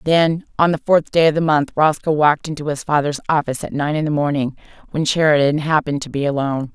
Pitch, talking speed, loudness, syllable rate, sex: 150 Hz, 220 wpm, -18 LUFS, 6.3 syllables/s, female